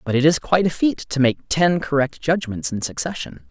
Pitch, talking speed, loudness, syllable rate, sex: 150 Hz, 225 wpm, -20 LUFS, 5.3 syllables/s, male